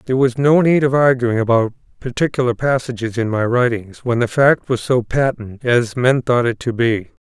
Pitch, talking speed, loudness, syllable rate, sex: 125 Hz, 200 wpm, -17 LUFS, 5.0 syllables/s, male